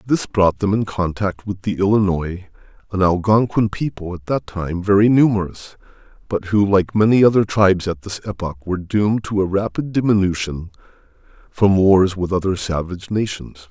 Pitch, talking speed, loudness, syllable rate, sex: 95 Hz, 160 wpm, -18 LUFS, 5.1 syllables/s, male